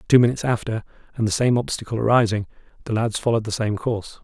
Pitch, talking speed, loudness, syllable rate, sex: 115 Hz, 200 wpm, -22 LUFS, 7.2 syllables/s, male